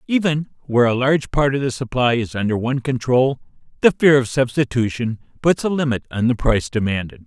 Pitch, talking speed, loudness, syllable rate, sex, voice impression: 125 Hz, 190 wpm, -19 LUFS, 5.9 syllables/s, male, masculine, middle-aged, tensed, powerful, slightly bright, clear, slightly calm, mature, friendly, unique, wild, slightly strict, slightly sharp